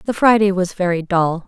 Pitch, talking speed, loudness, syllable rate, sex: 190 Hz, 205 wpm, -17 LUFS, 4.9 syllables/s, female